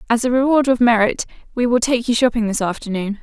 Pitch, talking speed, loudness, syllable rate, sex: 235 Hz, 225 wpm, -17 LUFS, 6.2 syllables/s, female